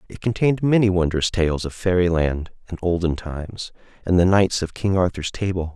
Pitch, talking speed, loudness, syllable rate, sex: 90 Hz, 190 wpm, -21 LUFS, 5.3 syllables/s, male